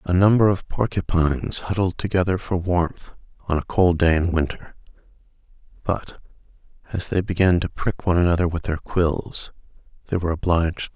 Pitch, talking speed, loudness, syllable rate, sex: 85 Hz, 165 wpm, -22 LUFS, 5.8 syllables/s, male